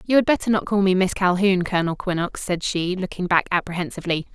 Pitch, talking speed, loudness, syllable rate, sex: 185 Hz, 205 wpm, -21 LUFS, 6.4 syllables/s, female